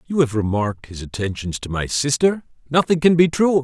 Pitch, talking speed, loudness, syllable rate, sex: 130 Hz, 200 wpm, -19 LUFS, 5.6 syllables/s, male